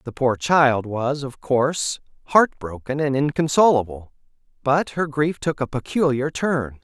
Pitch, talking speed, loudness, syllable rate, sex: 140 Hz, 140 wpm, -21 LUFS, 4.2 syllables/s, male